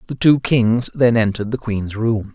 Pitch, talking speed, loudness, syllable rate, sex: 115 Hz, 205 wpm, -17 LUFS, 4.7 syllables/s, male